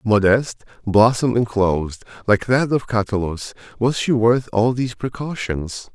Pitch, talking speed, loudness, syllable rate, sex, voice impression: 115 Hz, 110 wpm, -19 LUFS, 4.6 syllables/s, male, masculine, adult-like, slightly thick, slightly soft, sincere, slightly calm, slightly kind